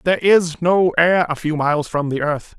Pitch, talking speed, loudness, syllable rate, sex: 165 Hz, 230 wpm, -17 LUFS, 5.0 syllables/s, male